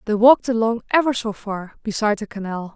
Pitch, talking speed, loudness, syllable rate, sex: 220 Hz, 195 wpm, -20 LUFS, 6.1 syllables/s, female